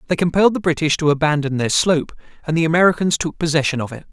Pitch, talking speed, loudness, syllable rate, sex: 160 Hz, 220 wpm, -18 LUFS, 7.0 syllables/s, male